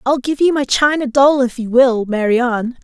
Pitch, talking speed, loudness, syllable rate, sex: 255 Hz, 210 wpm, -14 LUFS, 4.9 syllables/s, female